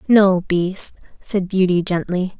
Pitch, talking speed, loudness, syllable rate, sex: 185 Hz, 125 wpm, -18 LUFS, 3.7 syllables/s, female